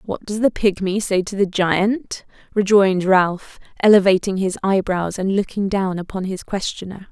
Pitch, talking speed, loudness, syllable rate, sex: 195 Hz, 160 wpm, -19 LUFS, 4.7 syllables/s, female